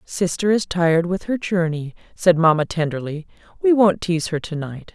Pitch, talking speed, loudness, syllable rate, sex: 175 Hz, 180 wpm, -20 LUFS, 5.1 syllables/s, female